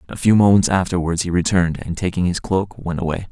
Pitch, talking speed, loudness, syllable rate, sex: 90 Hz, 215 wpm, -18 LUFS, 6.1 syllables/s, male